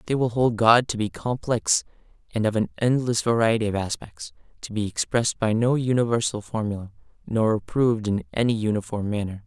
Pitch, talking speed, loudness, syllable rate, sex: 115 Hz, 170 wpm, -23 LUFS, 5.6 syllables/s, male